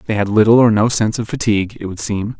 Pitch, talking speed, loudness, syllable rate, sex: 110 Hz, 275 wpm, -15 LUFS, 6.8 syllables/s, male